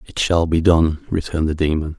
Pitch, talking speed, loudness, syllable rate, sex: 80 Hz, 210 wpm, -18 LUFS, 5.6 syllables/s, male